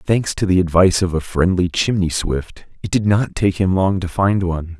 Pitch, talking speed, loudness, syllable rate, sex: 90 Hz, 225 wpm, -17 LUFS, 5.1 syllables/s, male